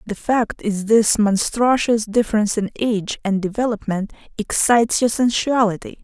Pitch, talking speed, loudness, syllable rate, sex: 220 Hz, 130 wpm, -19 LUFS, 4.8 syllables/s, female